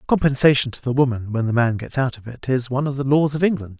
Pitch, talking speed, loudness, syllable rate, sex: 130 Hz, 285 wpm, -20 LUFS, 6.6 syllables/s, male